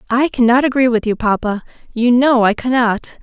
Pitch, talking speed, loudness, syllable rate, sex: 240 Hz, 185 wpm, -15 LUFS, 5.2 syllables/s, female